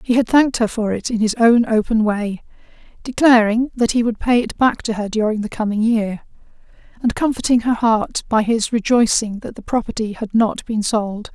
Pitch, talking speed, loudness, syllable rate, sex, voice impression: 225 Hz, 200 wpm, -18 LUFS, 5.1 syllables/s, female, very feminine, adult-like, calm, slightly elegant, slightly sweet